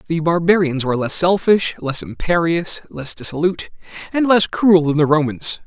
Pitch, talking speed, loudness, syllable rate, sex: 165 Hz, 160 wpm, -17 LUFS, 5.1 syllables/s, male